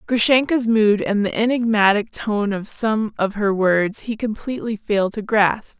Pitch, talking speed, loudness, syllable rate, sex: 215 Hz, 165 wpm, -19 LUFS, 4.5 syllables/s, female